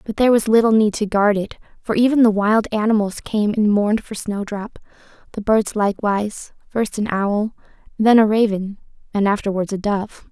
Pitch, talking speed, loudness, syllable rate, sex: 210 Hz, 180 wpm, -18 LUFS, 5.3 syllables/s, female